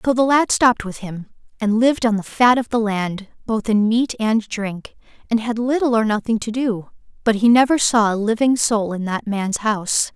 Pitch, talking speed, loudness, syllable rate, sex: 225 Hz, 220 wpm, -18 LUFS, 4.9 syllables/s, female